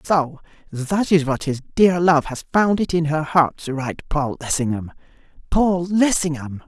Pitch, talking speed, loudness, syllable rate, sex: 155 Hz, 155 wpm, -20 LUFS, 4.5 syllables/s, male